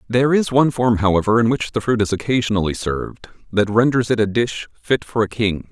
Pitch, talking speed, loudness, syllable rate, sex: 115 Hz, 220 wpm, -18 LUFS, 6.0 syllables/s, male